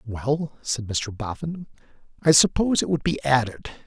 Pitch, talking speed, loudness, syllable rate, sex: 135 Hz, 155 wpm, -23 LUFS, 4.8 syllables/s, male